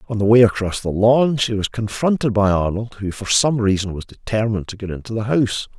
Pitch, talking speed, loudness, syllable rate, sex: 110 Hz, 230 wpm, -19 LUFS, 5.8 syllables/s, male